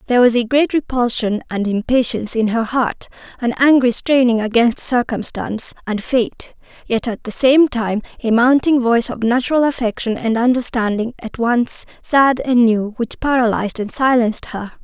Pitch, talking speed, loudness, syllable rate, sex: 240 Hz, 160 wpm, -16 LUFS, 5.0 syllables/s, female